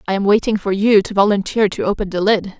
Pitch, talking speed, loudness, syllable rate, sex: 200 Hz, 255 wpm, -16 LUFS, 6.2 syllables/s, female